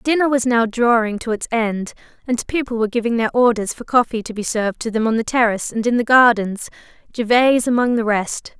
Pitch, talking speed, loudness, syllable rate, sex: 230 Hz, 215 wpm, -18 LUFS, 5.9 syllables/s, female